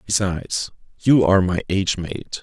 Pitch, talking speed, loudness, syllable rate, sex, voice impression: 95 Hz, 150 wpm, -20 LUFS, 5.2 syllables/s, male, masculine, adult-like, slightly thin, relaxed, slightly weak, slightly soft, slightly raspy, slightly calm, mature, slightly friendly, unique, slightly wild